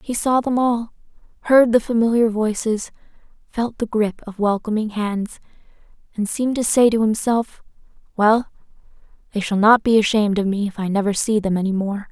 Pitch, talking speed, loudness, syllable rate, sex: 220 Hz, 175 wpm, -19 LUFS, 5.3 syllables/s, female